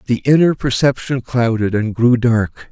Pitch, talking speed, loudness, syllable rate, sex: 120 Hz, 155 wpm, -15 LUFS, 4.4 syllables/s, male